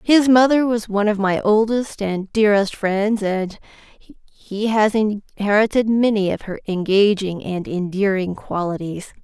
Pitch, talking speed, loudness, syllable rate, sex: 205 Hz, 135 wpm, -19 LUFS, 4.3 syllables/s, female